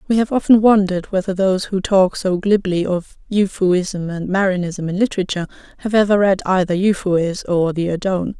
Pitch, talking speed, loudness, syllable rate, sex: 190 Hz, 170 wpm, -17 LUFS, 5.5 syllables/s, female